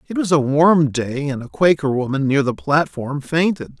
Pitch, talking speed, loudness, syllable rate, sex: 150 Hz, 205 wpm, -18 LUFS, 4.7 syllables/s, male